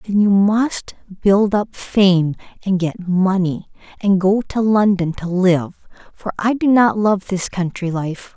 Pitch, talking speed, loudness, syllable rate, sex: 195 Hz, 165 wpm, -17 LUFS, 3.6 syllables/s, female